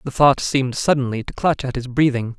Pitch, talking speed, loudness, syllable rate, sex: 130 Hz, 225 wpm, -19 LUFS, 5.7 syllables/s, male